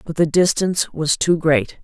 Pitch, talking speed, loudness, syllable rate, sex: 160 Hz, 195 wpm, -18 LUFS, 4.7 syllables/s, female